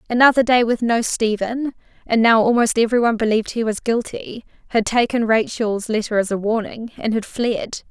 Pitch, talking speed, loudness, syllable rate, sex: 225 Hz, 180 wpm, -19 LUFS, 5.4 syllables/s, female